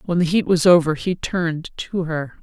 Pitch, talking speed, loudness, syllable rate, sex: 170 Hz, 225 wpm, -19 LUFS, 4.9 syllables/s, female